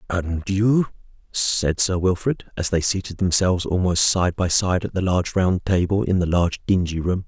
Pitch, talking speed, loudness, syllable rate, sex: 90 Hz, 190 wpm, -21 LUFS, 4.9 syllables/s, male